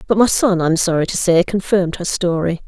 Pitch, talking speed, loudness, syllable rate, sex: 180 Hz, 245 wpm, -16 LUFS, 6.0 syllables/s, female